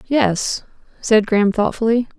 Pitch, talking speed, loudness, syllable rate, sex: 220 Hz, 110 wpm, -17 LUFS, 4.3 syllables/s, female